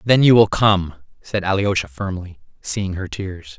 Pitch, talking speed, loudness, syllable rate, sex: 95 Hz, 170 wpm, -19 LUFS, 4.2 syllables/s, male